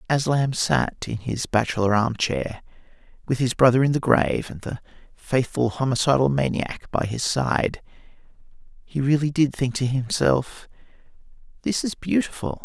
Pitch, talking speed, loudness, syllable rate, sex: 130 Hz, 145 wpm, -23 LUFS, 4.7 syllables/s, male